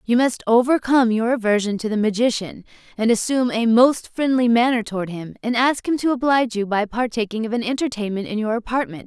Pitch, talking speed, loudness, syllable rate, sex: 230 Hz, 200 wpm, -20 LUFS, 6.0 syllables/s, female